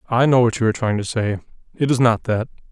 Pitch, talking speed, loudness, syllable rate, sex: 115 Hz, 265 wpm, -19 LUFS, 6.7 syllables/s, male